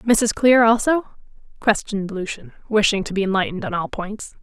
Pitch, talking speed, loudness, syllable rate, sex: 210 Hz, 165 wpm, -20 LUFS, 5.5 syllables/s, female